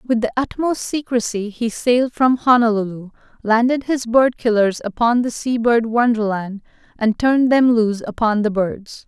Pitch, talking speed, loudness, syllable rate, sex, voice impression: 230 Hz, 160 wpm, -18 LUFS, 4.7 syllables/s, female, feminine, adult-like, powerful, bright, soft, fluent, intellectual, slightly calm, friendly, reassuring, lively, slightly kind